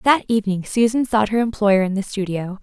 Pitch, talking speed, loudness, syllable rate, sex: 210 Hz, 205 wpm, -19 LUFS, 5.6 syllables/s, female